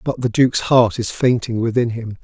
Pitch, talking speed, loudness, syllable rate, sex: 115 Hz, 215 wpm, -17 LUFS, 4.7 syllables/s, male